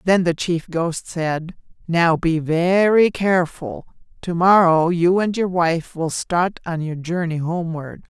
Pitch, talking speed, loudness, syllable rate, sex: 170 Hz, 155 wpm, -19 LUFS, 3.9 syllables/s, female